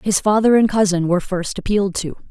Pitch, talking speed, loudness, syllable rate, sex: 195 Hz, 210 wpm, -17 LUFS, 6.2 syllables/s, female